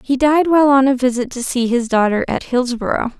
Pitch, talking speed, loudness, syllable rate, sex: 255 Hz, 225 wpm, -16 LUFS, 5.6 syllables/s, female